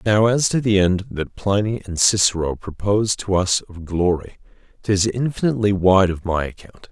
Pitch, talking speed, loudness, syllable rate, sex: 100 Hz, 175 wpm, -19 LUFS, 5.0 syllables/s, male